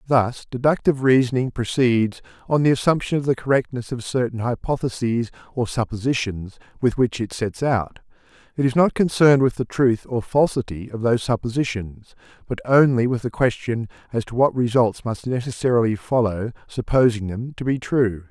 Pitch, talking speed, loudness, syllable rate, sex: 120 Hz, 160 wpm, -21 LUFS, 5.3 syllables/s, male